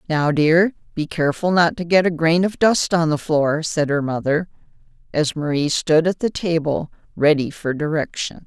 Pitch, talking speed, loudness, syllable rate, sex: 160 Hz, 185 wpm, -19 LUFS, 4.8 syllables/s, female